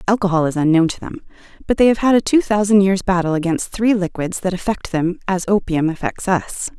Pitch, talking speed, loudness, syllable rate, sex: 190 Hz, 210 wpm, -17 LUFS, 5.6 syllables/s, female